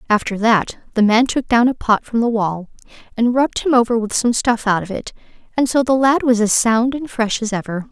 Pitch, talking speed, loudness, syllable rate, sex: 230 Hz, 240 wpm, -17 LUFS, 5.4 syllables/s, female